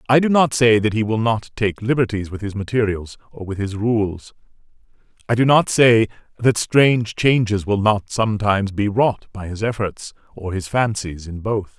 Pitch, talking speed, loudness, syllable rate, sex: 110 Hz, 190 wpm, -19 LUFS, 4.8 syllables/s, male